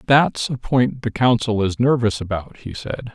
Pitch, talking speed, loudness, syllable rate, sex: 115 Hz, 190 wpm, -20 LUFS, 4.4 syllables/s, male